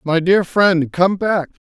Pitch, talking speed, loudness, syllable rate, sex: 175 Hz, 180 wpm, -16 LUFS, 3.5 syllables/s, male